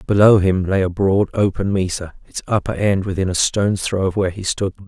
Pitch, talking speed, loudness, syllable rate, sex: 95 Hz, 220 wpm, -18 LUFS, 5.6 syllables/s, male